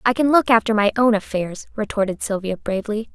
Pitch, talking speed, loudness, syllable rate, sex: 215 Hz, 190 wpm, -20 LUFS, 5.9 syllables/s, female